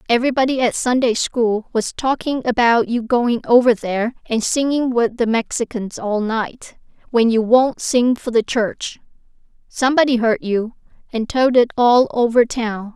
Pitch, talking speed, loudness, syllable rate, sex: 235 Hz, 155 wpm, -17 LUFS, 4.5 syllables/s, female